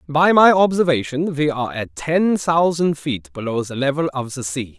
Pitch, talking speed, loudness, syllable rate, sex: 145 Hz, 190 wpm, -18 LUFS, 4.8 syllables/s, male